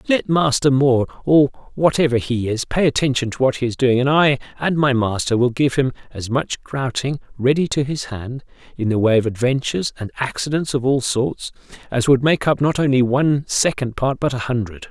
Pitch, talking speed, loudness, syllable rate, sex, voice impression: 130 Hz, 205 wpm, -19 LUFS, 5.3 syllables/s, male, masculine, adult-like, slightly thick, cool, sincere, slightly friendly, slightly kind